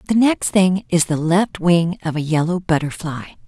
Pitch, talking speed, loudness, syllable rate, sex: 175 Hz, 190 wpm, -18 LUFS, 4.5 syllables/s, female